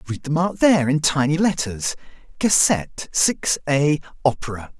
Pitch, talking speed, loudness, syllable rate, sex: 145 Hz, 140 wpm, -20 LUFS, 4.8 syllables/s, male